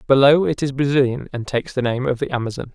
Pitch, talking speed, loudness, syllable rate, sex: 130 Hz, 240 wpm, -19 LUFS, 6.6 syllables/s, male